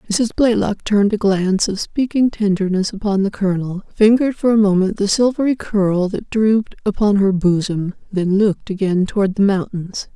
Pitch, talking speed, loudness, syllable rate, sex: 205 Hz, 170 wpm, -17 LUFS, 5.3 syllables/s, female